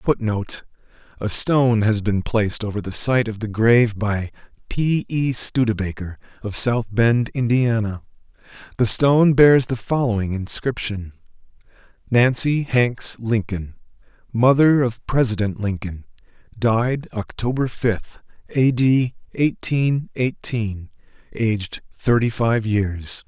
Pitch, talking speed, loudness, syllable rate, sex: 115 Hz, 115 wpm, -20 LUFS, 4.0 syllables/s, male